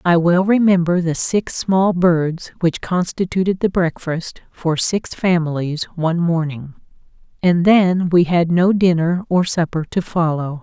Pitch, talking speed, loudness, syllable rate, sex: 175 Hz, 145 wpm, -17 LUFS, 4.1 syllables/s, female